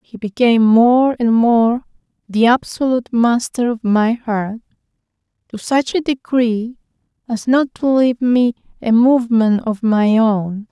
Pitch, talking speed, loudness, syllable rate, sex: 235 Hz, 140 wpm, -15 LUFS, 4.1 syllables/s, female